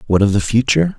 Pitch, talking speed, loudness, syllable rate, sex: 120 Hz, 245 wpm, -15 LUFS, 8.5 syllables/s, male